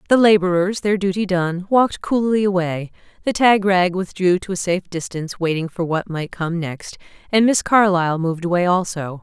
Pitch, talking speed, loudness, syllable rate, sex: 185 Hz, 175 wpm, -19 LUFS, 5.3 syllables/s, female